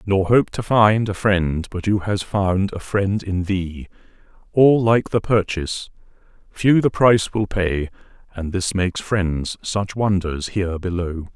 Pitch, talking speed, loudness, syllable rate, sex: 95 Hz, 165 wpm, -20 LUFS, 4.1 syllables/s, male